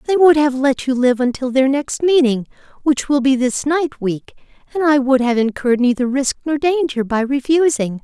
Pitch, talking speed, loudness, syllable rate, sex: 270 Hz, 200 wpm, -16 LUFS, 5.0 syllables/s, female